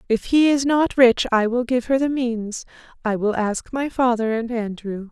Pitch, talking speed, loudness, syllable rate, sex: 240 Hz, 210 wpm, -20 LUFS, 4.4 syllables/s, female